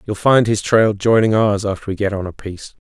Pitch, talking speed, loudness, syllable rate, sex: 105 Hz, 250 wpm, -16 LUFS, 5.7 syllables/s, male